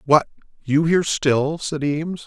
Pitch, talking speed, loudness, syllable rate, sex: 150 Hz, 160 wpm, -20 LUFS, 4.5 syllables/s, male